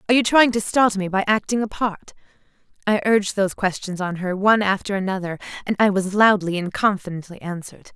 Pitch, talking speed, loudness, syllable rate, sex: 200 Hz, 195 wpm, -20 LUFS, 6.3 syllables/s, female